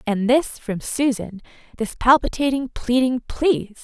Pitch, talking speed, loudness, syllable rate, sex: 245 Hz, 110 wpm, -21 LUFS, 4.3 syllables/s, female